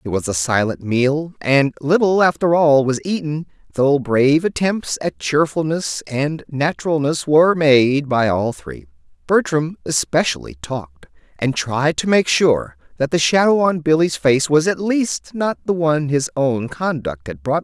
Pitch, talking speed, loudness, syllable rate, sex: 145 Hz, 165 wpm, -18 LUFS, 4.5 syllables/s, male